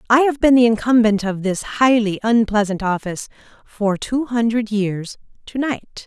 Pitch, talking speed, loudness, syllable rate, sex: 225 Hz, 160 wpm, -18 LUFS, 4.6 syllables/s, female